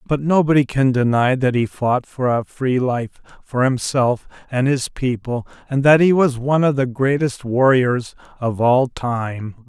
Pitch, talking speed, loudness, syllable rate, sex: 130 Hz, 175 wpm, -18 LUFS, 4.2 syllables/s, male